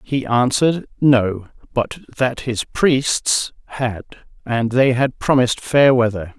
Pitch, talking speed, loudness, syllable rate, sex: 125 Hz, 130 wpm, -18 LUFS, 3.8 syllables/s, male